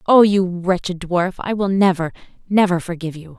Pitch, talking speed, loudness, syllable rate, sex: 180 Hz, 175 wpm, -18 LUFS, 5.3 syllables/s, female